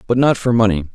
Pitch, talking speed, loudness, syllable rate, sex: 110 Hz, 255 wpm, -16 LUFS, 7.0 syllables/s, male